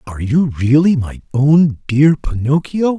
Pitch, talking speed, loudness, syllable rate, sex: 145 Hz, 140 wpm, -14 LUFS, 4.2 syllables/s, male